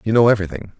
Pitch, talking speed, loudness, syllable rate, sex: 105 Hz, 225 wpm, -16 LUFS, 9.0 syllables/s, male